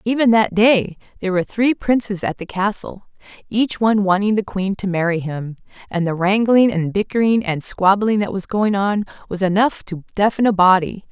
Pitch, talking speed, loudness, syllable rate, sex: 200 Hz, 190 wpm, -18 LUFS, 5.2 syllables/s, female